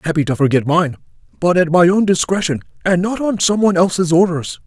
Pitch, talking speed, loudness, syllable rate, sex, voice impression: 170 Hz, 205 wpm, -15 LUFS, 6.2 syllables/s, male, masculine, adult-like, slightly muffled, fluent, slightly cool, slightly unique, slightly intense